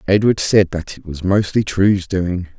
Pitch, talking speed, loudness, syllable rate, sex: 95 Hz, 185 wpm, -17 LUFS, 4.3 syllables/s, male